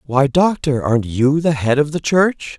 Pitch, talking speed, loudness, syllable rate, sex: 145 Hz, 210 wpm, -16 LUFS, 4.5 syllables/s, male